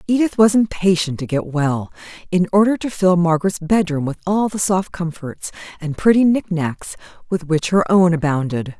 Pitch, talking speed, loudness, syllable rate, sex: 175 Hz, 185 wpm, -18 LUFS, 5.0 syllables/s, female